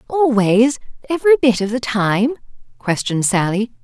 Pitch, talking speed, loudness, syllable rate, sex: 235 Hz, 125 wpm, -16 LUFS, 4.9 syllables/s, female